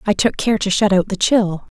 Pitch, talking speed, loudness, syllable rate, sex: 205 Hz, 270 wpm, -17 LUFS, 5.1 syllables/s, female